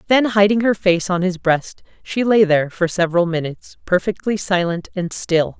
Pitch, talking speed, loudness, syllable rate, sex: 185 Hz, 180 wpm, -18 LUFS, 5.1 syllables/s, female